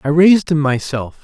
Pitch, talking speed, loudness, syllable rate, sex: 150 Hz, 195 wpm, -14 LUFS, 5.3 syllables/s, male